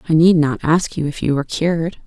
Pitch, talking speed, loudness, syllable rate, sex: 160 Hz, 260 wpm, -17 LUFS, 6.2 syllables/s, female